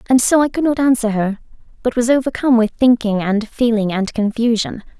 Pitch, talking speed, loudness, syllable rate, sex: 235 Hz, 190 wpm, -16 LUFS, 5.6 syllables/s, female